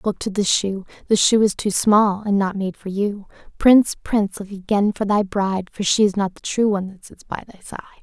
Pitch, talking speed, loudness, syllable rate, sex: 200 Hz, 240 wpm, -19 LUFS, 5.3 syllables/s, female